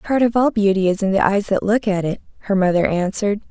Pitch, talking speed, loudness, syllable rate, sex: 200 Hz, 255 wpm, -18 LUFS, 6.2 syllables/s, female